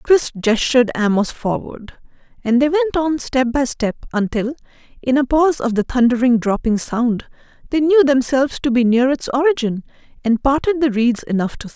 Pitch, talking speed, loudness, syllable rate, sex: 255 Hz, 180 wpm, -17 LUFS, 5.2 syllables/s, female